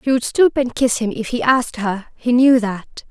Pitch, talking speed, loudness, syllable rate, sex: 240 Hz, 250 wpm, -17 LUFS, 4.9 syllables/s, female